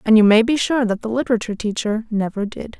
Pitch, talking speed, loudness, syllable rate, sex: 225 Hz, 235 wpm, -19 LUFS, 6.4 syllables/s, female